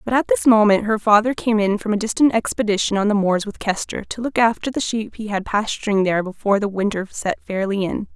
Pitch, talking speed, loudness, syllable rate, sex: 210 Hz, 235 wpm, -19 LUFS, 5.9 syllables/s, female